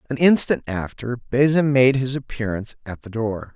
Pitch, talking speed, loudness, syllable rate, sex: 125 Hz, 170 wpm, -20 LUFS, 5.1 syllables/s, male